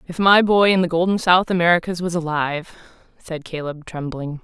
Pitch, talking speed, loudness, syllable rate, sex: 170 Hz, 175 wpm, -19 LUFS, 5.6 syllables/s, female